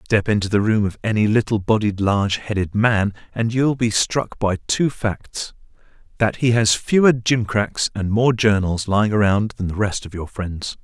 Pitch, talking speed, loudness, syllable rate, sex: 105 Hz, 190 wpm, -19 LUFS, 4.7 syllables/s, male